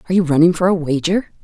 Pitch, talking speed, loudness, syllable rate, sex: 170 Hz, 250 wpm, -16 LUFS, 7.8 syllables/s, female